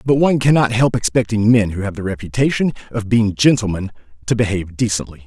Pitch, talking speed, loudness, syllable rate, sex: 110 Hz, 180 wpm, -17 LUFS, 6.3 syllables/s, male